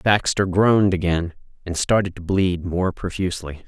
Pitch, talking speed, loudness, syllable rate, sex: 90 Hz, 145 wpm, -21 LUFS, 4.9 syllables/s, male